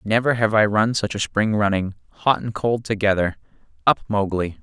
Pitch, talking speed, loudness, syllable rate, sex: 105 Hz, 170 wpm, -21 LUFS, 5.2 syllables/s, male